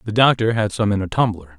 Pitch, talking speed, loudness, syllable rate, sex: 105 Hz, 265 wpm, -19 LUFS, 6.3 syllables/s, male